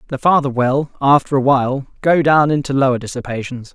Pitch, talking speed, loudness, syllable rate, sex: 135 Hz, 175 wpm, -16 LUFS, 5.8 syllables/s, male